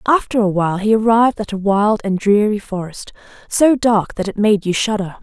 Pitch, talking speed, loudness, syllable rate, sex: 210 Hz, 205 wpm, -16 LUFS, 5.2 syllables/s, female